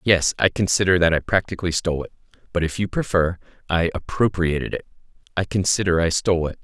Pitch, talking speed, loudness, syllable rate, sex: 90 Hz, 180 wpm, -21 LUFS, 6.3 syllables/s, male